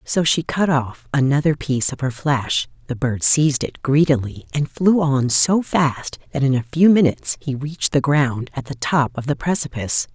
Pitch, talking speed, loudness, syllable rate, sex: 140 Hz, 200 wpm, -19 LUFS, 4.9 syllables/s, female